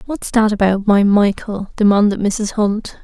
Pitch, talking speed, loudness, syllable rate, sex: 210 Hz, 160 wpm, -15 LUFS, 4.2 syllables/s, female